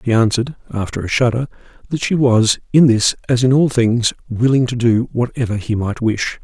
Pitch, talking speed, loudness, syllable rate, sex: 120 Hz, 175 wpm, -16 LUFS, 5.3 syllables/s, male